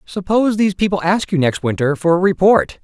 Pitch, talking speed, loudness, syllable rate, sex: 180 Hz, 210 wpm, -16 LUFS, 5.9 syllables/s, male